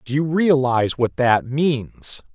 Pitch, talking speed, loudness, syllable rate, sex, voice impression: 135 Hz, 155 wpm, -19 LUFS, 3.7 syllables/s, male, very masculine, slightly middle-aged, very thick, tensed, powerful, slightly bright, very soft, slightly clear, fluent, raspy, very cool, intellectual, refreshing, sincere, very calm, very mature, very friendly, reassuring, unique, slightly elegant, wild, slightly sweet, lively, kind, slightly intense